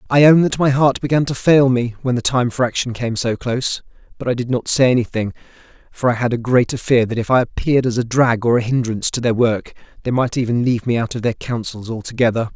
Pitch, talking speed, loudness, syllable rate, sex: 120 Hz, 250 wpm, -17 LUFS, 6.2 syllables/s, male